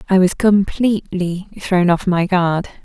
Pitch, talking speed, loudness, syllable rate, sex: 185 Hz, 150 wpm, -17 LUFS, 4.2 syllables/s, female